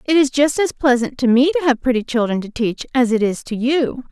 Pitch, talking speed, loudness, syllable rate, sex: 255 Hz, 265 wpm, -17 LUFS, 5.5 syllables/s, female